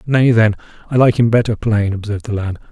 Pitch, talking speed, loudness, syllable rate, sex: 110 Hz, 220 wpm, -15 LUFS, 6.0 syllables/s, male